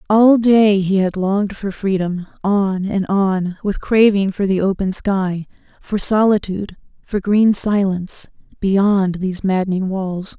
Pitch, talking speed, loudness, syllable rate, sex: 195 Hz, 145 wpm, -17 LUFS, 4.1 syllables/s, female